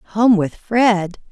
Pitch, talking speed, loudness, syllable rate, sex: 205 Hz, 135 wpm, -16 LUFS, 2.5 syllables/s, female